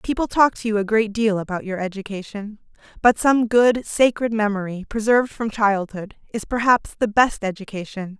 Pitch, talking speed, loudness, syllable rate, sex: 215 Hz, 170 wpm, -20 LUFS, 5.2 syllables/s, female